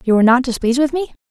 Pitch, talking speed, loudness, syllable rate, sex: 260 Hz, 275 wpm, -16 LUFS, 8.4 syllables/s, female